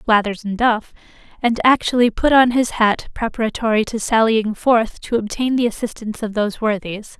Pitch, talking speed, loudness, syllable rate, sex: 225 Hz, 165 wpm, -18 LUFS, 5.2 syllables/s, female